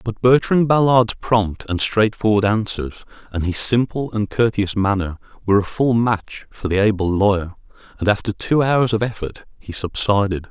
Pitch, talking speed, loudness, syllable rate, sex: 105 Hz, 165 wpm, -18 LUFS, 4.9 syllables/s, male